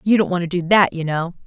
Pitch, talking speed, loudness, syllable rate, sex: 175 Hz, 330 wpm, -18 LUFS, 6.3 syllables/s, female